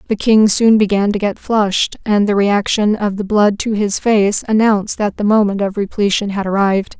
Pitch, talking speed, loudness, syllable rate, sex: 205 Hz, 205 wpm, -15 LUFS, 5.1 syllables/s, female